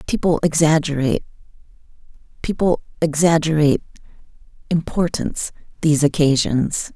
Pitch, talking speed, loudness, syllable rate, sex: 155 Hz, 45 wpm, -19 LUFS, 5.4 syllables/s, female